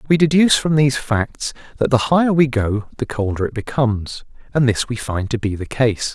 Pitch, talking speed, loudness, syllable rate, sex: 125 Hz, 215 wpm, -18 LUFS, 5.4 syllables/s, male